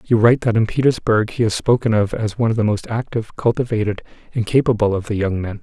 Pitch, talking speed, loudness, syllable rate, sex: 110 Hz, 235 wpm, -18 LUFS, 6.6 syllables/s, male